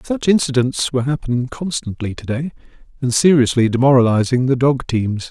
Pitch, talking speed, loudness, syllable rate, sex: 130 Hz, 145 wpm, -17 LUFS, 5.5 syllables/s, male